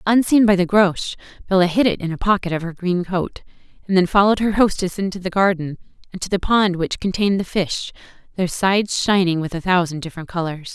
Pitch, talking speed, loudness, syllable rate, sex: 185 Hz, 210 wpm, -19 LUFS, 6.1 syllables/s, female